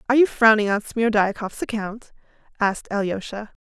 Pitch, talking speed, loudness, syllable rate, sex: 215 Hz, 130 wpm, -21 LUFS, 5.5 syllables/s, female